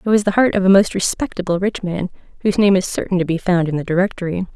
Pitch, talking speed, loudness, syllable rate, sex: 185 Hz, 265 wpm, -17 LUFS, 6.9 syllables/s, female